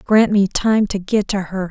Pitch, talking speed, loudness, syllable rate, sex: 200 Hz, 245 wpm, -17 LUFS, 4.4 syllables/s, female